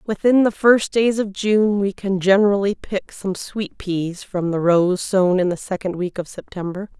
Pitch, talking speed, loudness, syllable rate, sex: 195 Hz, 195 wpm, -19 LUFS, 4.4 syllables/s, female